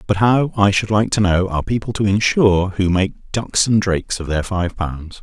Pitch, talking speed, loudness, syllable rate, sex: 100 Hz, 230 wpm, -17 LUFS, 5.2 syllables/s, male